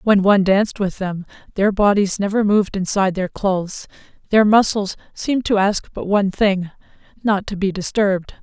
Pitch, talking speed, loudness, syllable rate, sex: 200 Hz, 165 wpm, -18 LUFS, 5.4 syllables/s, female